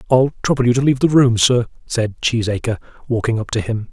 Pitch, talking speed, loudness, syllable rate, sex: 120 Hz, 215 wpm, -17 LUFS, 6.2 syllables/s, male